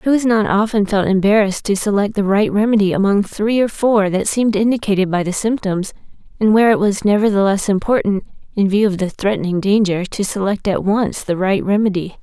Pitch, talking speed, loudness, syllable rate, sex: 205 Hz, 195 wpm, -16 LUFS, 5.7 syllables/s, female